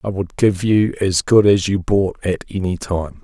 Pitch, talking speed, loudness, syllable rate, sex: 95 Hz, 220 wpm, -17 LUFS, 4.4 syllables/s, male